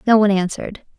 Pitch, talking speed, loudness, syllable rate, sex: 205 Hz, 180 wpm, -17 LUFS, 8.1 syllables/s, female